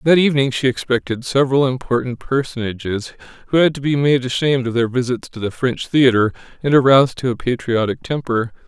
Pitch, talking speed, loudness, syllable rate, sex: 130 Hz, 180 wpm, -18 LUFS, 5.9 syllables/s, male